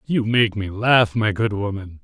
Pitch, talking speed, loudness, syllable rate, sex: 105 Hz, 205 wpm, -19 LUFS, 4.2 syllables/s, male